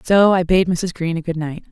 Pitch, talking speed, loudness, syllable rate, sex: 175 Hz, 280 wpm, -18 LUFS, 5.1 syllables/s, female